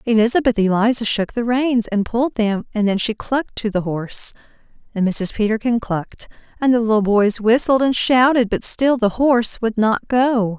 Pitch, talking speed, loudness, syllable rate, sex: 225 Hz, 185 wpm, -18 LUFS, 5.1 syllables/s, female